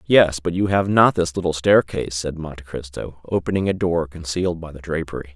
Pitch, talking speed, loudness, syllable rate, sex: 85 Hz, 200 wpm, -21 LUFS, 5.7 syllables/s, male